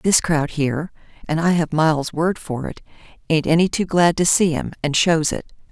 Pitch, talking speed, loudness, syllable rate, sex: 160 Hz, 190 wpm, -19 LUFS, 5.0 syllables/s, female